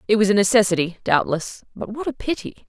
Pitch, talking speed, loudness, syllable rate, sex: 210 Hz, 200 wpm, -20 LUFS, 6.2 syllables/s, female